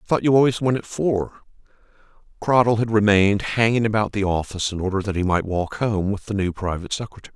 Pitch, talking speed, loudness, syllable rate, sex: 105 Hz, 210 wpm, -21 LUFS, 6.5 syllables/s, male